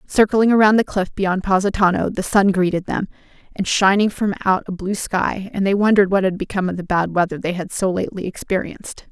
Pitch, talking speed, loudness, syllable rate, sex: 190 Hz, 205 wpm, -18 LUFS, 5.8 syllables/s, female